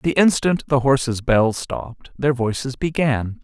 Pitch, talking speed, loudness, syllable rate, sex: 135 Hz, 155 wpm, -20 LUFS, 4.3 syllables/s, male